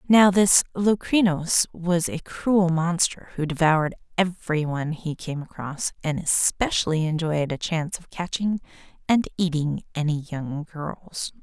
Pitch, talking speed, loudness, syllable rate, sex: 165 Hz, 130 wpm, -23 LUFS, 4.2 syllables/s, female